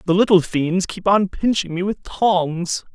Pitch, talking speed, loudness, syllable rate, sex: 185 Hz, 185 wpm, -19 LUFS, 4.0 syllables/s, male